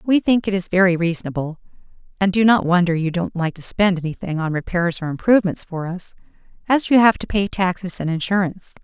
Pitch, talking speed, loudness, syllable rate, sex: 185 Hz, 205 wpm, -19 LUFS, 6.0 syllables/s, female